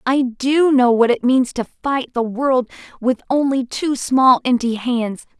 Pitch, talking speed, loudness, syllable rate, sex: 255 Hz, 180 wpm, -17 LUFS, 3.8 syllables/s, female